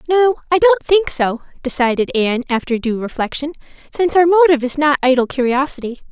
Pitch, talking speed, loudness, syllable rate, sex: 285 Hz, 165 wpm, -16 LUFS, 6.1 syllables/s, female